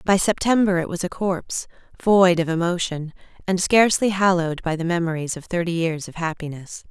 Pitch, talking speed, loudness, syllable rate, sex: 175 Hz, 175 wpm, -21 LUFS, 5.6 syllables/s, female